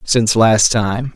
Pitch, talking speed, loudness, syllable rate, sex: 115 Hz, 155 wpm, -14 LUFS, 3.8 syllables/s, male